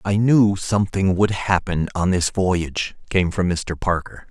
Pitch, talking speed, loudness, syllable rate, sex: 95 Hz, 165 wpm, -20 LUFS, 4.3 syllables/s, male